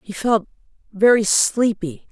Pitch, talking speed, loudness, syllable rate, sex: 210 Hz, 115 wpm, -18 LUFS, 3.9 syllables/s, female